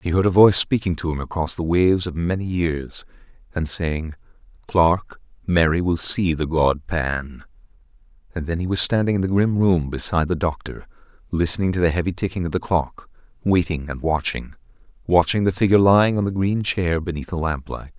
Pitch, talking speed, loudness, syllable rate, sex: 85 Hz, 185 wpm, -21 LUFS, 5.5 syllables/s, male